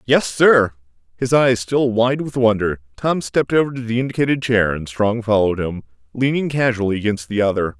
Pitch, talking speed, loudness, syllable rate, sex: 115 Hz, 185 wpm, -18 LUFS, 5.5 syllables/s, male